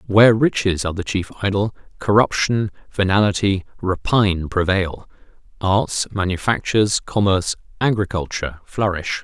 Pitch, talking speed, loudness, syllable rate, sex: 100 Hz, 95 wpm, -19 LUFS, 5.0 syllables/s, male